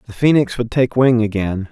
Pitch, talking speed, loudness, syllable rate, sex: 115 Hz, 210 wpm, -16 LUFS, 5.2 syllables/s, male